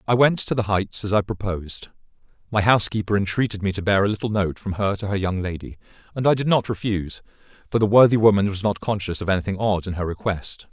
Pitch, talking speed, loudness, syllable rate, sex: 100 Hz, 230 wpm, -22 LUFS, 6.4 syllables/s, male